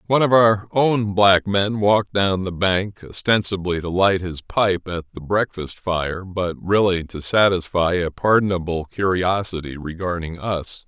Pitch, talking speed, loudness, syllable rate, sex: 95 Hz, 155 wpm, -20 LUFS, 4.3 syllables/s, male